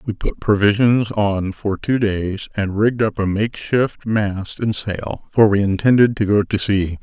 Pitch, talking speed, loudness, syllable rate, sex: 105 Hz, 195 wpm, -18 LUFS, 4.1 syllables/s, male